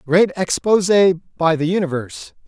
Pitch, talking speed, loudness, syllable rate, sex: 175 Hz, 120 wpm, -17 LUFS, 5.2 syllables/s, male